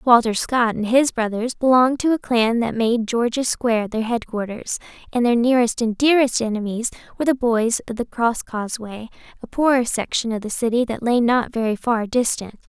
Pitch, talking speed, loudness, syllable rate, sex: 235 Hz, 185 wpm, -20 LUFS, 5.4 syllables/s, female